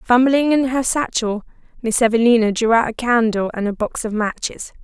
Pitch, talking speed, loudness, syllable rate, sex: 235 Hz, 185 wpm, -18 LUFS, 5.2 syllables/s, female